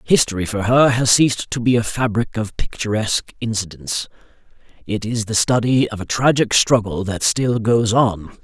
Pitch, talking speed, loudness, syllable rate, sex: 110 Hz, 170 wpm, -18 LUFS, 4.9 syllables/s, male